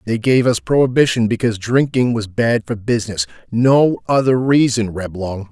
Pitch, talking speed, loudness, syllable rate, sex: 115 Hz, 150 wpm, -16 LUFS, 4.9 syllables/s, male